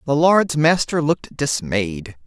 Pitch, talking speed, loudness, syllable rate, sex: 140 Hz, 130 wpm, -18 LUFS, 3.9 syllables/s, male